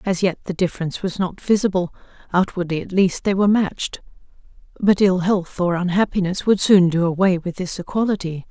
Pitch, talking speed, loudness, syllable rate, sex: 185 Hz, 175 wpm, -20 LUFS, 5.8 syllables/s, female